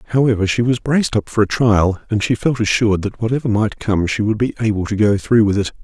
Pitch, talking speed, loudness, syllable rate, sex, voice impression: 110 Hz, 255 wpm, -17 LUFS, 6.2 syllables/s, male, very masculine, middle-aged, slightly thick, calm, slightly mature, reassuring, slightly sweet